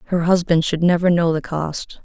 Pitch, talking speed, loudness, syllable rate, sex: 170 Hz, 205 wpm, -18 LUFS, 5.0 syllables/s, female